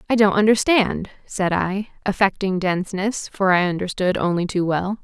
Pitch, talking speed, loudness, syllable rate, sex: 195 Hz, 155 wpm, -20 LUFS, 5.0 syllables/s, female